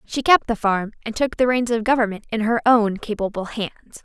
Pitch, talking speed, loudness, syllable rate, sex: 225 Hz, 225 wpm, -20 LUFS, 5.5 syllables/s, female